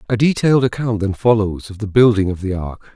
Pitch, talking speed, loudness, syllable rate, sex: 105 Hz, 225 wpm, -17 LUFS, 6.1 syllables/s, male